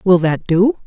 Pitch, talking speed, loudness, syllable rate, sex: 190 Hz, 210 wpm, -15 LUFS, 4.4 syllables/s, female